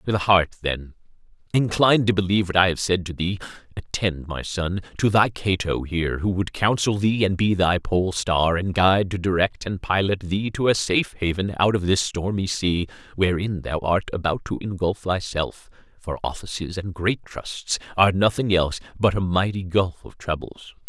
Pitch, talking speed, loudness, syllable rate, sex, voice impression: 95 Hz, 185 wpm, -22 LUFS, 5.1 syllables/s, male, masculine, adult-like, thick, fluent, cool, slightly intellectual, calm, slightly elegant